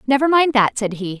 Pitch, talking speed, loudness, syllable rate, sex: 240 Hz, 250 wpm, -17 LUFS, 5.7 syllables/s, female